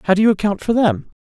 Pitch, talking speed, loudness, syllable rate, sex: 200 Hz, 290 wpm, -17 LUFS, 7.2 syllables/s, female